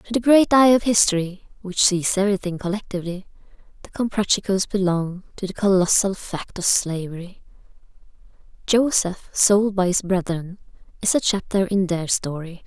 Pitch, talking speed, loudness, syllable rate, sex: 190 Hz, 140 wpm, -20 LUFS, 5.1 syllables/s, female